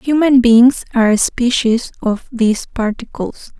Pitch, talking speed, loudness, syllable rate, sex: 240 Hz, 135 wpm, -14 LUFS, 4.4 syllables/s, female